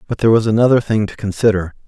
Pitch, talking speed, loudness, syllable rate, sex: 105 Hz, 225 wpm, -15 LUFS, 7.4 syllables/s, male